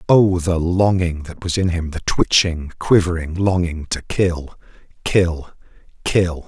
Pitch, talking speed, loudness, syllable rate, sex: 85 Hz, 120 wpm, -19 LUFS, 3.8 syllables/s, male